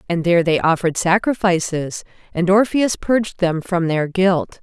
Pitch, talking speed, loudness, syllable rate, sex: 180 Hz, 155 wpm, -18 LUFS, 4.8 syllables/s, female